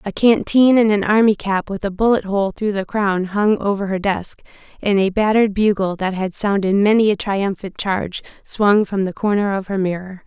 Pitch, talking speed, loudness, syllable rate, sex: 200 Hz, 205 wpm, -18 LUFS, 5.0 syllables/s, female